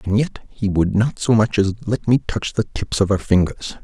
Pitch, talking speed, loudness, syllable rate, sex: 105 Hz, 250 wpm, -19 LUFS, 4.9 syllables/s, male